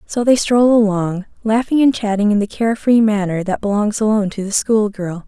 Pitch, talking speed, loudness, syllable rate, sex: 210 Hz, 215 wpm, -16 LUFS, 5.4 syllables/s, female